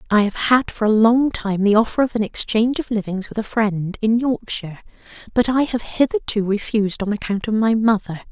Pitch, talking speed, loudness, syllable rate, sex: 220 Hz, 210 wpm, -19 LUFS, 5.5 syllables/s, female